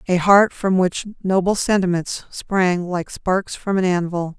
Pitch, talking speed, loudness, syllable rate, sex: 185 Hz, 165 wpm, -19 LUFS, 4.0 syllables/s, female